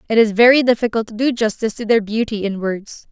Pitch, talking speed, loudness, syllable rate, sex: 220 Hz, 230 wpm, -17 LUFS, 6.2 syllables/s, female